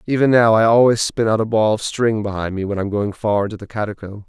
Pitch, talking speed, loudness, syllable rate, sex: 110 Hz, 280 wpm, -17 LUFS, 6.3 syllables/s, male